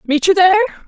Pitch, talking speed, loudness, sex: 370 Hz, 205 wpm, -13 LUFS, female